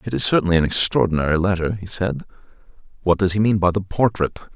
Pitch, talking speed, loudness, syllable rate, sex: 95 Hz, 195 wpm, -19 LUFS, 6.6 syllables/s, male